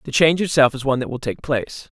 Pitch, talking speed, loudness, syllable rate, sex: 140 Hz, 270 wpm, -19 LUFS, 7.2 syllables/s, male